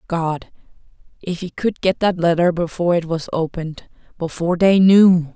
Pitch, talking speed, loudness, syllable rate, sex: 170 Hz, 145 wpm, -18 LUFS, 5.0 syllables/s, female